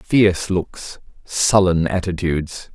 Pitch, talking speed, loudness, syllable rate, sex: 90 Hz, 85 wpm, -18 LUFS, 3.7 syllables/s, male